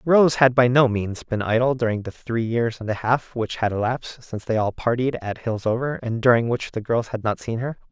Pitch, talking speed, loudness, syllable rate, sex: 120 Hz, 245 wpm, -22 LUFS, 5.3 syllables/s, male